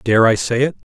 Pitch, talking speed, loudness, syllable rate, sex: 120 Hz, 265 wpm, -16 LUFS, 5.4 syllables/s, male